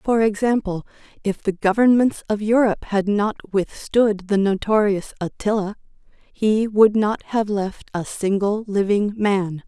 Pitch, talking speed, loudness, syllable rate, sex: 205 Hz, 135 wpm, -20 LUFS, 4.1 syllables/s, female